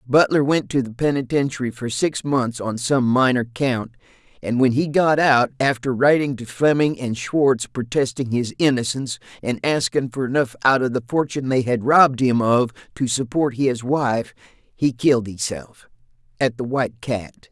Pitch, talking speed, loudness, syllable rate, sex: 130 Hz, 170 wpm, -20 LUFS, 4.8 syllables/s, male